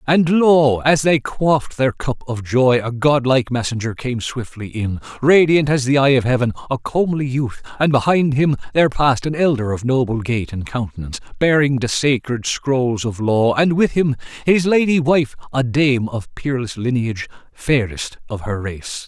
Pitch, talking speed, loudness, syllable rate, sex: 130 Hz, 180 wpm, -18 LUFS, 4.8 syllables/s, male